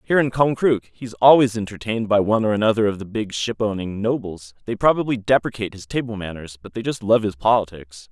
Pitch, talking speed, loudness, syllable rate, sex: 105 Hz, 205 wpm, -20 LUFS, 6.1 syllables/s, male